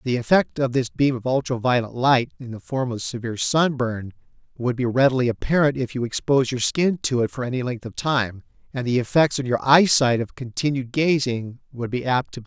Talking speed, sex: 220 wpm, male